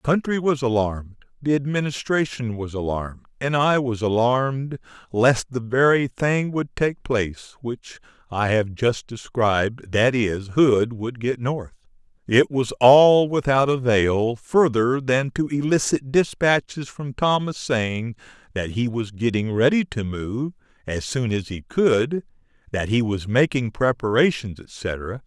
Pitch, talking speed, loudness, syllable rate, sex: 125 Hz, 145 wpm, -21 LUFS, 4.1 syllables/s, male